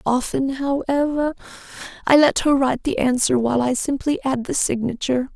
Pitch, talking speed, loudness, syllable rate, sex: 265 Hz, 155 wpm, -20 LUFS, 5.4 syllables/s, female